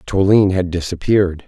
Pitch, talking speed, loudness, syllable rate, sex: 95 Hz, 120 wpm, -16 LUFS, 5.6 syllables/s, male